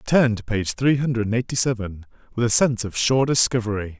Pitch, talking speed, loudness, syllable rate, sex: 115 Hz, 210 wpm, -21 LUFS, 6.3 syllables/s, male